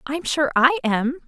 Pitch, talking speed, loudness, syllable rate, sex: 285 Hz, 190 wpm, -20 LUFS, 4.1 syllables/s, female